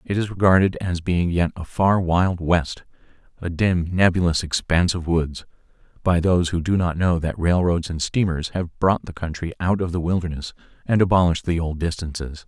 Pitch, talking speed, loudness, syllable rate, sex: 85 Hz, 180 wpm, -21 LUFS, 5.2 syllables/s, male